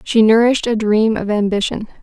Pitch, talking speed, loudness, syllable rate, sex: 220 Hz, 180 wpm, -15 LUFS, 5.6 syllables/s, female